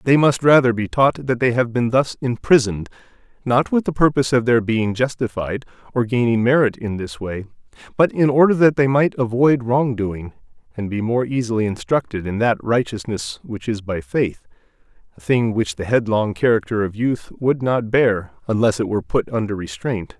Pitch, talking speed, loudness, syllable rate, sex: 115 Hz, 185 wpm, -19 LUFS, 5.1 syllables/s, male